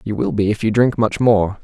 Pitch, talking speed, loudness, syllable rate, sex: 105 Hz, 295 wpm, -17 LUFS, 5.3 syllables/s, male